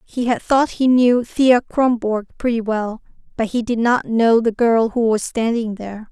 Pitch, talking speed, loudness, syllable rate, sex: 230 Hz, 195 wpm, -18 LUFS, 4.3 syllables/s, female